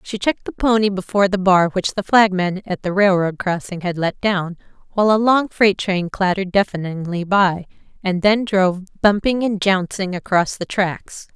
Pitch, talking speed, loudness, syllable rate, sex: 190 Hz, 180 wpm, -18 LUFS, 4.9 syllables/s, female